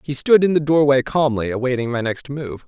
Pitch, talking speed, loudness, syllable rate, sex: 135 Hz, 225 wpm, -18 LUFS, 5.5 syllables/s, male